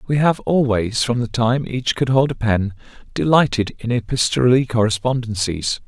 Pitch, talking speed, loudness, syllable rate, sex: 120 Hz, 155 wpm, -18 LUFS, 4.9 syllables/s, male